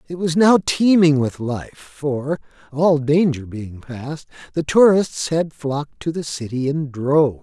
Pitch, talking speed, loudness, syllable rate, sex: 150 Hz, 160 wpm, -19 LUFS, 3.9 syllables/s, male